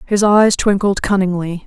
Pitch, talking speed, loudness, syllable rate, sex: 195 Hz, 145 wpm, -14 LUFS, 4.5 syllables/s, female